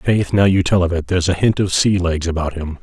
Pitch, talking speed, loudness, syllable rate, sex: 90 Hz, 295 wpm, -17 LUFS, 5.8 syllables/s, male